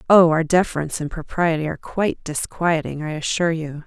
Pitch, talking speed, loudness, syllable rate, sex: 165 Hz, 170 wpm, -21 LUFS, 6.0 syllables/s, female